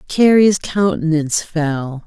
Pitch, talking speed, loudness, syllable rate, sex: 170 Hz, 85 wpm, -16 LUFS, 3.7 syllables/s, female